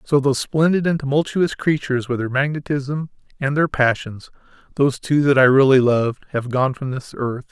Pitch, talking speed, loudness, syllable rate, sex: 135 Hz, 170 wpm, -19 LUFS, 5.4 syllables/s, male